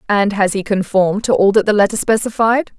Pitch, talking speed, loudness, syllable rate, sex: 205 Hz, 215 wpm, -15 LUFS, 5.8 syllables/s, female